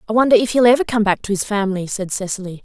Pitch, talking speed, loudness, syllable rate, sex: 210 Hz, 275 wpm, -17 LUFS, 7.4 syllables/s, female